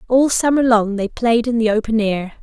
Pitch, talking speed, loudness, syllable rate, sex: 230 Hz, 225 wpm, -17 LUFS, 5.0 syllables/s, female